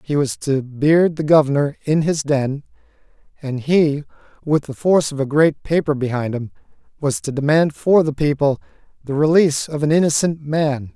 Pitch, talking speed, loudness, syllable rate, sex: 150 Hz, 175 wpm, -18 LUFS, 4.9 syllables/s, male